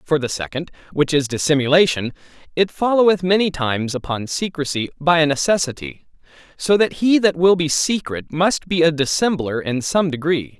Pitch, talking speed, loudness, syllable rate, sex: 155 Hz, 165 wpm, -18 LUFS, 5.2 syllables/s, male